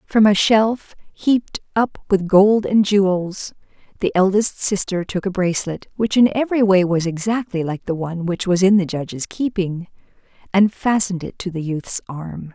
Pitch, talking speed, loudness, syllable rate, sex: 195 Hz, 175 wpm, -19 LUFS, 4.8 syllables/s, female